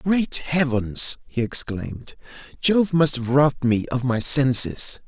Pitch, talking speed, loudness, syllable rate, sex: 140 Hz, 140 wpm, -20 LUFS, 3.8 syllables/s, male